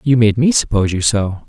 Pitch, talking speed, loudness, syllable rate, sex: 110 Hz, 245 wpm, -15 LUFS, 5.9 syllables/s, male